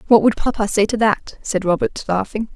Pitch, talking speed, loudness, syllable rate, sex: 210 Hz, 210 wpm, -19 LUFS, 5.2 syllables/s, female